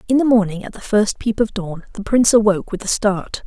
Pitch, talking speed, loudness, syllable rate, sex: 210 Hz, 260 wpm, -17 LUFS, 6.0 syllables/s, female